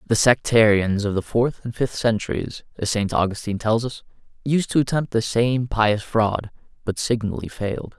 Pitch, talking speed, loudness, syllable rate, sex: 115 Hz, 175 wpm, -21 LUFS, 4.9 syllables/s, male